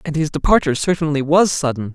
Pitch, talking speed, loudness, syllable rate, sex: 150 Hz, 185 wpm, -17 LUFS, 6.5 syllables/s, male